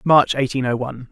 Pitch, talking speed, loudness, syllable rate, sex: 130 Hz, 215 wpm, -19 LUFS, 2.8 syllables/s, male